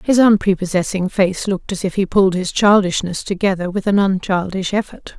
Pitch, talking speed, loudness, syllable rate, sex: 190 Hz, 175 wpm, -17 LUFS, 5.5 syllables/s, female